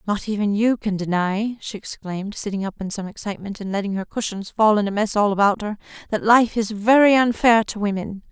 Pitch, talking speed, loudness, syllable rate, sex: 205 Hz, 215 wpm, -21 LUFS, 5.7 syllables/s, female